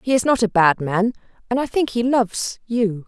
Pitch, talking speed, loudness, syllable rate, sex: 225 Hz, 235 wpm, -20 LUFS, 5.1 syllables/s, female